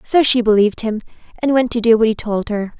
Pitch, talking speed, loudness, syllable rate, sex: 225 Hz, 260 wpm, -16 LUFS, 6.0 syllables/s, female